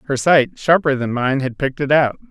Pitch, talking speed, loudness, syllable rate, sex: 140 Hz, 235 wpm, -17 LUFS, 5.4 syllables/s, male